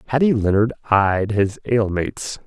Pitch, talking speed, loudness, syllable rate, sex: 110 Hz, 120 wpm, -19 LUFS, 5.0 syllables/s, male